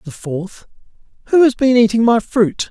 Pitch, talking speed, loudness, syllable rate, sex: 225 Hz, 175 wpm, -15 LUFS, 4.6 syllables/s, male